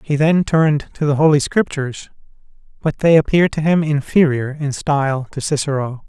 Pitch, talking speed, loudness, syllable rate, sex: 145 Hz, 170 wpm, -17 LUFS, 5.4 syllables/s, male